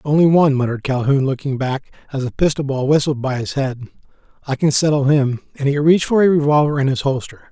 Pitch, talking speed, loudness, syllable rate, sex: 140 Hz, 215 wpm, -17 LUFS, 6.3 syllables/s, male